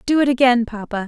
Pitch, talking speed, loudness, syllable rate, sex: 245 Hz, 225 wpm, -17 LUFS, 6.2 syllables/s, female